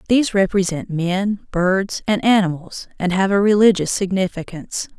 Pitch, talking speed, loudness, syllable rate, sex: 190 Hz, 130 wpm, -18 LUFS, 4.9 syllables/s, female